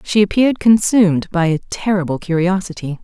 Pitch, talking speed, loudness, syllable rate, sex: 190 Hz, 140 wpm, -16 LUFS, 5.5 syllables/s, female